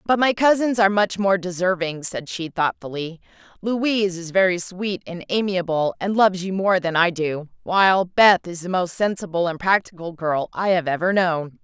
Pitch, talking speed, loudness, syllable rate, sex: 185 Hz, 185 wpm, -21 LUFS, 5.0 syllables/s, female